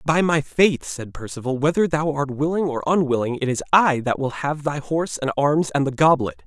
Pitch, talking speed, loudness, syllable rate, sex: 145 Hz, 225 wpm, -21 LUFS, 5.2 syllables/s, male